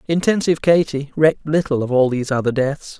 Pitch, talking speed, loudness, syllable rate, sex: 145 Hz, 180 wpm, -18 LUFS, 6.1 syllables/s, male